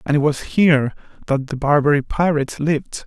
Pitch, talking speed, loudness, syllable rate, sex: 145 Hz, 175 wpm, -18 LUFS, 5.8 syllables/s, male